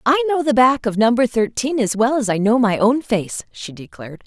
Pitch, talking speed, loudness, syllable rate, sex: 225 Hz, 240 wpm, -17 LUFS, 5.0 syllables/s, female